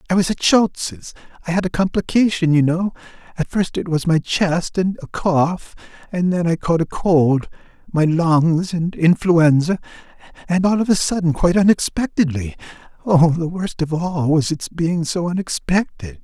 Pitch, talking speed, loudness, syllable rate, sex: 170 Hz, 165 wpm, -18 LUFS, 4.5 syllables/s, male